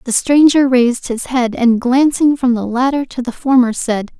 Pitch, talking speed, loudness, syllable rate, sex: 250 Hz, 200 wpm, -14 LUFS, 4.7 syllables/s, female